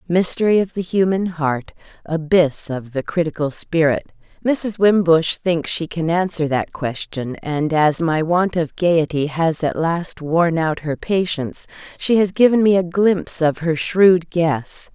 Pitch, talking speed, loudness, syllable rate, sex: 165 Hz, 160 wpm, -18 LUFS, 4.1 syllables/s, female